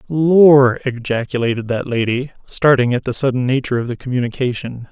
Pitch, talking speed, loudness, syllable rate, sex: 130 Hz, 145 wpm, -16 LUFS, 5.5 syllables/s, male